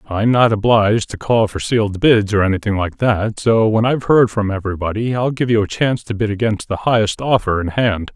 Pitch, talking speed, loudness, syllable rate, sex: 110 Hz, 230 wpm, -16 LUFS, 5.6 syllables/s, male